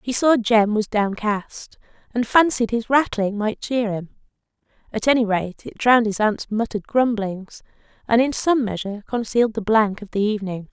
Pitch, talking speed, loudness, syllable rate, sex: 220 Hz, 175 wpm, -20 LUFS, 5.0 syllables/s, female